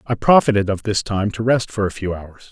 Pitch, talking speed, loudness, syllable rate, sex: 105 Hz, 265 wpm, -18 LUFS, 5.5 syllables/s, male